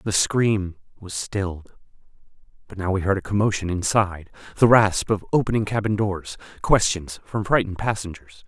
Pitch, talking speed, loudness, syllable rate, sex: 100 Hz, 140 wpm, -22 LUFS, 5.1 syllables/s, male